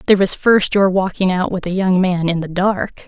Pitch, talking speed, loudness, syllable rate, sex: 185 Hz, 255 wpm, -16 LUFS, 5.5 syllables/s, female